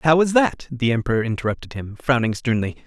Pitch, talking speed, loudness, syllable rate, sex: 130 Hz, 190 wpm, -21 LUFS, 6.0 syllables/s, male